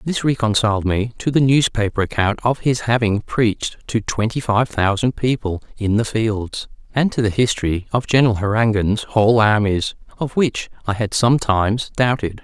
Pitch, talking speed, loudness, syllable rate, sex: 110 Hz, 165 wpm, -18 LUFS, 5.1 syllables/s, male